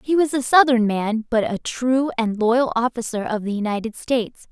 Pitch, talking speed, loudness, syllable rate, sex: 235 Hz, 200 wpm, -20 LUFS, 4.9 syllables/s, female